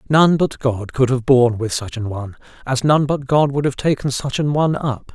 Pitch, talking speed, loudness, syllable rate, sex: 135 Hz, 245 wpm, -18 LUFS, 5.4 syllables/s, male